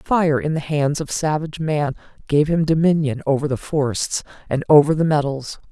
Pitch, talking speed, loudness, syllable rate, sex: 150 Hz, 180 wpm, -19 LUFS, 5.1 syllables/s, female